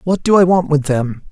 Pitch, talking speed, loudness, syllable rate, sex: 160 Hz, 275 wpm, -14 LUFS, 5.2 syllables/s, male